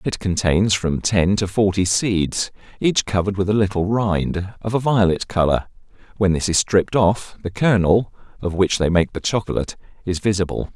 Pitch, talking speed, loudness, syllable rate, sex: 95 Hz, 180 wpm, -19 LUFS, 5.0 syllables/s, male